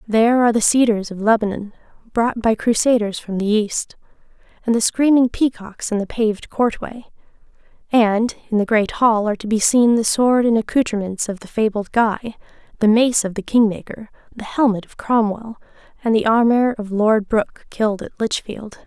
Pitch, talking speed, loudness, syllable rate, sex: 220 Hz, 175 wpm, -18 LUFS, 5.1 syllables/s, female